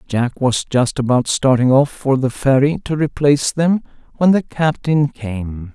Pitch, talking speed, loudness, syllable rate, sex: 135 Hz, 165 wpm, -16 LUFS, 4.2 syllables/s, male